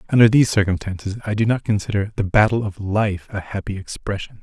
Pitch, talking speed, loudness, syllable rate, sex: 100 Hz, 190 wpm, -20 LUFS, 6.1 syllables/s, male